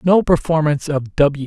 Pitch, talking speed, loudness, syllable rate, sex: 155 Hz, 165 wpm, -17 LUFS, 4.9 syllables/s, male